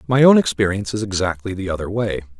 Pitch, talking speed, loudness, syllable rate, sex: 100 Hz, 200 wpm, -19 LUFS, 6.8 syllables/s, male